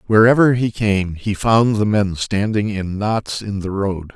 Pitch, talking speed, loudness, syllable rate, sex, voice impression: 105 Hz, 190 wpm, -18 LUFS, 4.0 syllables/s, male, very masculine, very adult-like, thick, cool, slightly calm, wild, slightly kind